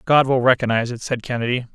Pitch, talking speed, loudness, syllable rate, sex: 125 Hz, 205 wpm, -19 LUFS, 7.0 syllables/s, male